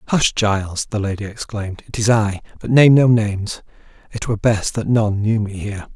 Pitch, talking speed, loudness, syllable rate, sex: 105 Hz, 200 wpm, -18 LUFS, 5.5 syllables/s, male